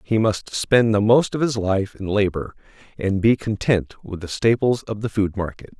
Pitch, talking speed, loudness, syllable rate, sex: 105 Hz, 205 wpm, -21 LUFS, 4.6 syllables/s, male